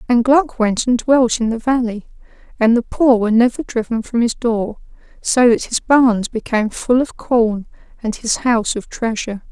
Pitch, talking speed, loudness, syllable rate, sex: 235 Hz, 190 wpm, -16 LUFS, 4.9 syllables/s, female